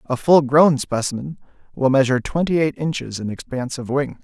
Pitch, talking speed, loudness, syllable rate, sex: 135 Hz, 185 wpm, -19 LUFS, 5.6 syllables/s, male